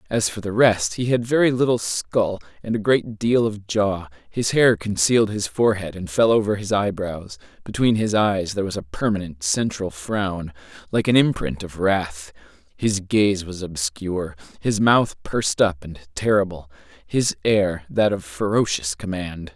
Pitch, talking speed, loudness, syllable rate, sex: 100 Hz, 170 wpm, -21 LUFS, 4.5 syllables/s, male